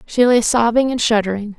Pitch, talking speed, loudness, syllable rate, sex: 230 Hz, 190 wpm, -16 LUFS, 5.5 syllables/s, female